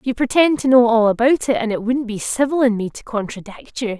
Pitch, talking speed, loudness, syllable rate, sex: 240 Hz, 255 wpm, -17 LUFS, 5.7 syllables/s, female